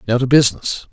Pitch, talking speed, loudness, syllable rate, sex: 125 Hz, 195 wpm, -15 LUFS, 6.7 syllables/s, male